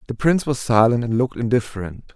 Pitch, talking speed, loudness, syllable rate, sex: 120 Hz, 195 wpm, -19 LUFS, 6.6 syllables/s, male